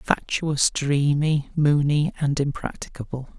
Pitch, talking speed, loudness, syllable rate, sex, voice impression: 145 Hz, 90 wpm, -23 LUFS, 3.8 syllables/s, male, masculine, adult-like, relaxed, weak, dark, muffled, raspy, sincere, calm, unique, kind, modest